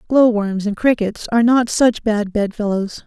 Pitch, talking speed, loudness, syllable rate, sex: 220 Hz, 175 wpm, -17 LUFS, 4.5 syllables/s, female